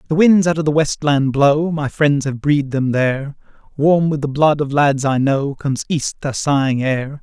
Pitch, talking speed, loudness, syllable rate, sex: 145 Hz, 225 wpm, -17 LUFS, 4.8 syllables/s, male